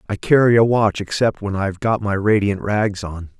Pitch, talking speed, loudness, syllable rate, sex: 100 Hz, 210 wpm, -18 LUFS, 5.1 syllables/s, male